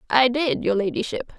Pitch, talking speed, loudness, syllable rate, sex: 235 Hz, 175 wpm, -22 LUFS, 5.1 syllables/s, female